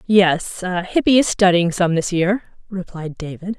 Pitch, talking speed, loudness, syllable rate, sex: 185 Hz, 150 wpm, -18 LUFS, 4.3 syllables/s, female